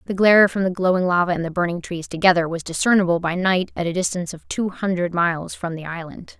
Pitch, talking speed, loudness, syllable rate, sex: 180 Hz, 235 wpm, -20 LUFS, 6.3 syllables/s, female